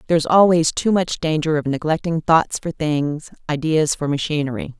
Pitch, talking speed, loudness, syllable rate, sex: 155 Hz, 175 wpm, -19 LUFS, 5.2 syllables/s, female